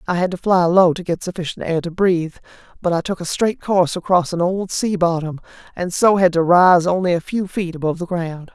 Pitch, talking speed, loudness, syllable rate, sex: 175 Hz, 240 wpm, -18 LUFS, 5.7 syllables/s, female